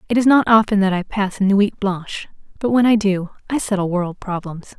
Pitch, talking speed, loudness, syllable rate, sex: 205 Hz, 225 wpm, -18 LUFS, 5.4 syllables/s, female